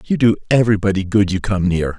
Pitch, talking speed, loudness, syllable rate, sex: 100 Hz, 210 wpm, -17 LUFS, 6.3 syllables/s, male